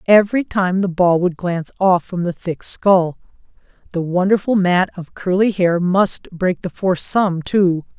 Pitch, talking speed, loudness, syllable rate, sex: 185 Hz, 175 wpm, -17 LUFS, 4.4 syllables/s, female